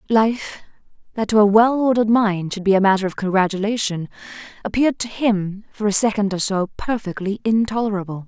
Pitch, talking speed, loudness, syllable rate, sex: 210 Hz, 165 wpm, -19 LUFS, 5.7 syllables/s, female